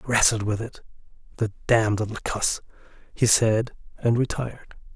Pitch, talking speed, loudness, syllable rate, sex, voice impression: 110 Hz, 120 wpm, -24 LUFS, 5.0 syllables/s, male, masculine, adult-like, slightly thick, slightly clear, cool, slightly sincere